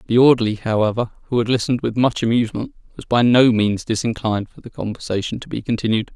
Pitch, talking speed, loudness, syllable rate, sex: 115 Hz, 195 wpm, -19 LUFS, 6.7 syllables/s, male